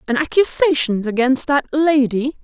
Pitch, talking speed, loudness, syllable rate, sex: 270 Hz, 125 wpm, -17 LUFS, 4.6 syllables/s, female